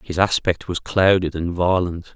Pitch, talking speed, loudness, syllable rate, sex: 90 Hz, 165 wpm, -20 LUFS, 4.6 syllables/s, male